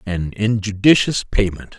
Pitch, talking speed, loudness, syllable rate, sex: 105 Hz, 100 wpm, -18 LUFS, 4.2 syllables/s, male